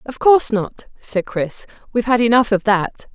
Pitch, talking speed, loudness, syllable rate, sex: 225 Hz, 190 wpm, -17 LUFS, 4.9 syllables/s, female